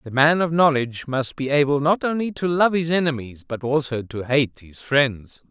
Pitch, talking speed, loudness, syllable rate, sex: 145 Hz, 205 wpm, -21 LUFS, 4.9 syllables/s, male